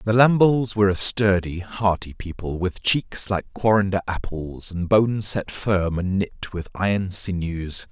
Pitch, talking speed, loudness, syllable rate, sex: 95 Hz, 160 wpm, -22 LUFS, 4.3 syllables/s, male